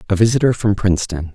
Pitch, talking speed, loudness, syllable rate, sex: 100 Hz, 180 wpm, -17 LUFS, 6.8 syllables/s, male